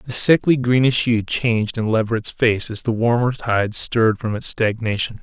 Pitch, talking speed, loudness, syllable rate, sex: 115 Hz, 185 wpm, -19 LUFS, 4.9 syllables/s, male